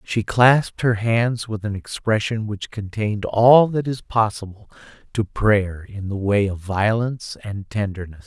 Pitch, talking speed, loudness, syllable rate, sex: 105 Hz, 160 wpm, -20 LUFS, 4.3 syllables/s, male